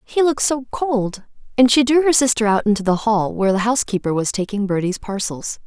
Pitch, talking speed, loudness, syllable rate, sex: 220 Hz, 210 wpm, -18 LUFS, 5.6 syllables/s, female